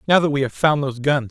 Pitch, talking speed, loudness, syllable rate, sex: 140 Hz, 320 wpm, -19 LUFS, 6.7 syllables/s, male